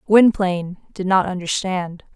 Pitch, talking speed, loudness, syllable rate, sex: 190 Hz, 110 wpm, -19 LUFS, 4.4 syllables/s, female